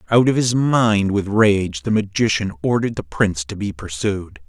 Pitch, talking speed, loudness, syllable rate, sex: 100 Hz, 190 wpm, -19 LUFS, 4.8 syllables/s, male